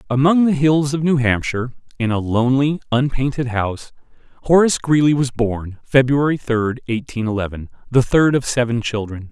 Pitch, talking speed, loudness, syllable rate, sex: 130 Hz, 155 wpm, -18 LUFS, 5.3 syllables/s, male